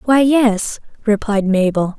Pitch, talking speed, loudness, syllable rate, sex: 220 Hz, 120 wpm, -16 LUFS, 3.8 syllables/s, female